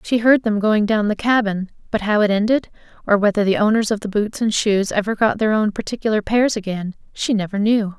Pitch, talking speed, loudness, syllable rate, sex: 210 Hz, 225 wpm, -18 LUFS, 5.6 syllables/s, female